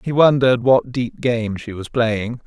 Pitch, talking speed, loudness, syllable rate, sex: 120 Hz, 195 wpm, -18 LUFS, 4.3 syllables/s, male